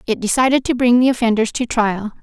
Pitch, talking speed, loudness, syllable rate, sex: 235 Hz, 215 wpm, -16 LUFS, 6.0 syllables/s, female